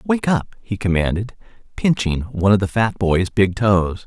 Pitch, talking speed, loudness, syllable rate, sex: 100 Hz, 175 wpm, -19 LUFS, 4.6 syllables/s, male